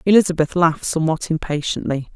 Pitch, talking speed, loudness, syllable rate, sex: 165 Hz, 110 wpm, -19 LUFS, 6.5 syllables/s, female